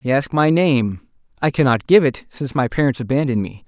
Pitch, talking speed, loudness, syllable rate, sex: 135 Hz, 210 wpm, -18 LUFS, 5.9 syllables/s, male